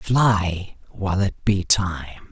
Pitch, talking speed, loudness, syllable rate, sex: 95 Hz, 130 wpm, -21 LUFS, 3.4 syllables/s, male